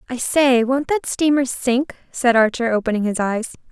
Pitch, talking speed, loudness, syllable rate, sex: 250 Hz, 180 wpm, -19 LUFS, 4.8 syllables/s, female